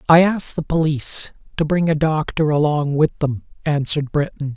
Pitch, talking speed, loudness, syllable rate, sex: 155 Hz, 170 wpm, -19 LUFS, 5.3 syllables/s, male